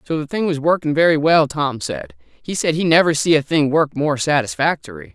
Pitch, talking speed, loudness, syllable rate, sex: 155 Hz, 220 wpm, -17 LUFS, 5.3 syllables/s, male